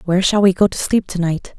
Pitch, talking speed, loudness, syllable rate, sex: 185 Hz, 305 wpm, -16 LUFS, 6.2 syllables/s, female